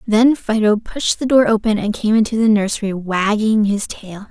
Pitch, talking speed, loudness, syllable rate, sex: 215 Hz, 195 wpm, -16 LUFS, 4.8 syllables/s, female